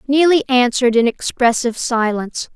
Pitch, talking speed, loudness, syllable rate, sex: 250 Hz, 120 wpm, -16 LUFS, 5.6 syllables/s, female